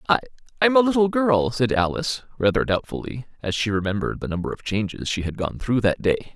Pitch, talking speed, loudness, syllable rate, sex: 120 Hz, 200 wpm, -22 LUFS, 5.8 syllables/s, male